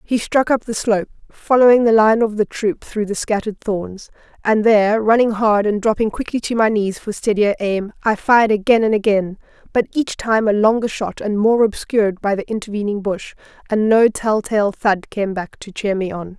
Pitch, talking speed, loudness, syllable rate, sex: 210 Hz, 205 wpm, -17 LUFS, 5.1 syllables/s, female